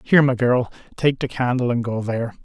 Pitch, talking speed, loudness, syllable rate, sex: 125 Hz, 220 wpm, -20 LUFS, 5.9 syllables/s, male